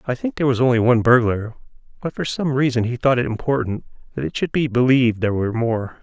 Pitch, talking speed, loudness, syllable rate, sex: 125 Hz, 230 wpm, -19 LUFS, 6.7 syllables/s, male